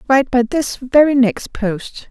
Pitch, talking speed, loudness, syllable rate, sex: 250 Hz, 170 wpm, -16 LUFS, 4.2 syllables/s, female